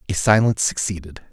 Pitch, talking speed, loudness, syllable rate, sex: 95 Hz, 135 wpm, -19 LUFS, 6.4 syllables/s, male